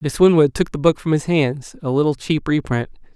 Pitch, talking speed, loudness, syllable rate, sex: 150 Hz, 210 wpm, -18 LUFS, 5.3 syllables/s, male